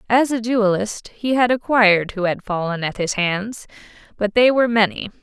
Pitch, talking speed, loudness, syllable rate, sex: 215 Hz, 185 wpm, -18 LUFS, 5.0 syllables/s, female